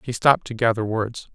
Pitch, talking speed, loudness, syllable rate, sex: 115 Hz, 220 wpm, -21 LUFS, 5.9 syllables/s, male